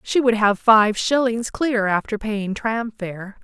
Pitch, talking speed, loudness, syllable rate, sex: 220 Hz, 175 wpm, -20 LUFS, 3.6 syllables/s, female